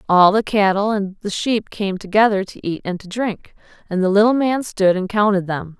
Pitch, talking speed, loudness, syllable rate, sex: 200 Hz, 215 wpm, -18 LUFS, 5.0 syllables/s, female